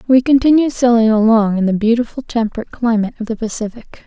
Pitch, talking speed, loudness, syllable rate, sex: 230 Hz, 175 wpm, -15 LUFS, 6.5 syllables/s, female